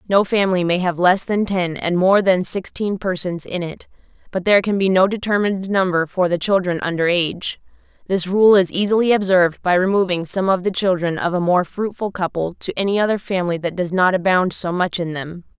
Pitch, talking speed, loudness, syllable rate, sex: 185 Hz, 210 wpm, -18 LUFS, 5.6 syllables/s, female